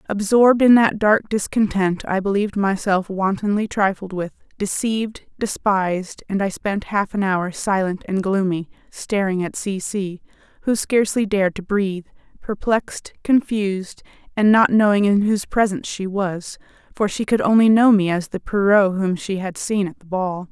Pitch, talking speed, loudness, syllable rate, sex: 200 Hz, 165 wpm, -19 LUFS, 4.9 syllables/s, female